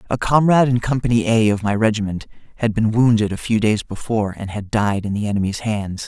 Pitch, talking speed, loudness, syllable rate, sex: 110 Hz, 215 wpm, -19 LUFS, 6.0 syllables/s, male